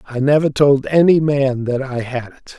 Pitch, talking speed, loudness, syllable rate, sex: 140 Hz, 210 wpm, -16 LUFS, 4.7 syllables/s, male